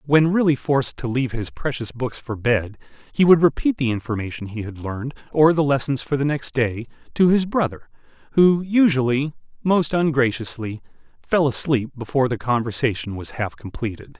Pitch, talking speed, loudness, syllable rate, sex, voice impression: 135 Hz, 170 wpm, -21 LUFS, 5.3 syllables/s, male, masculine, adult-like, thick, tensed, powerful, clear, fluent, intellectual, slightly friendly, wild, lively, slightly kind